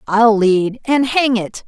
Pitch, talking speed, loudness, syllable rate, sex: 230 Hz, 180 wpm, -15 LUFS, 3.4 syllables/s, female